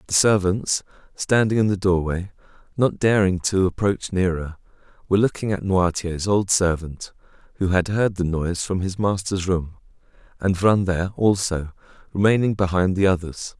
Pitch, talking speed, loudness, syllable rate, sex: 95 Hz, 150 wpm, -21 LUFS, 4.9 syllables/s, male